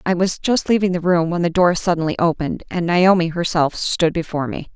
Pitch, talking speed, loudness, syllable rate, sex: 175 Hz, 215 wpm, -18 LUFS, 5.7 syllables/s, female